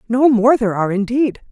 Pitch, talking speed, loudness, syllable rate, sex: 230 Hz, 200 wpm, -15 LUFS, 6.1 syllables/s, female